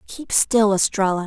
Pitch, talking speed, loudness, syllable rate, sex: 200 Hz, 140 wpm, -19 LUFS, 4.5 syllables/s, female